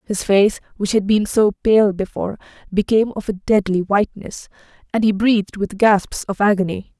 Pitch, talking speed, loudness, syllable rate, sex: 205 Hz, 170 wpm, -18 LUFS, 5.1 syllables/s, female